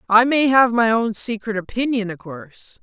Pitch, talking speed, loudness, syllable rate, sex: 225 Hz, 190 wpm, -18 LUFS, 4.9 syllables/s, female